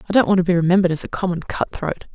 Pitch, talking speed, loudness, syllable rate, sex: 180 Hz, 310 wpm, -19 LUFS, 8.2 syllables/s, female